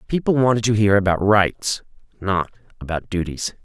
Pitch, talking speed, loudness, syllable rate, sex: 105 Hz, 150 wpm, -20 LUFS, 5.0 syllables/s, male